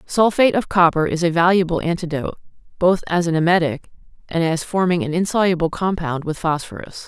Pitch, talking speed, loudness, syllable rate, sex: 170 Hz, 160 wpm, -19 LUFS, 5.9 syllables/s, female